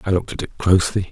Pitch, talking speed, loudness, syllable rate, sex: 95 Hz, 270 wpm, -19 LUFS, 7.9 syllables/s, male